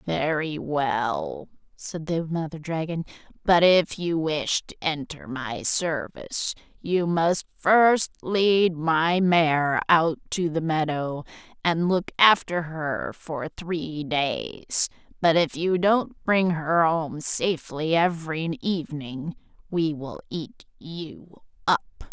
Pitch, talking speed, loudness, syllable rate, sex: 160 Hz, 125 wpm, -24 LUFS, 3.2 syllables/s, female